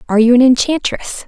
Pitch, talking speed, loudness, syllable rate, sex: 250 Hz, 190 wpm, -12 LUFS, 6.4 syllables/s, female